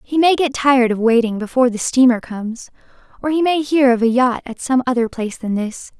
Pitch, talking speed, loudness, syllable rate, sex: 250 Hz, 230 wpm, -17 LUFS, 5.9 syllables/s, female